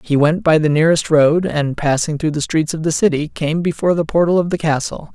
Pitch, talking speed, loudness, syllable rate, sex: 160 Hz, 245 wpm, -16 LUFS, 5.8 syllables/s, male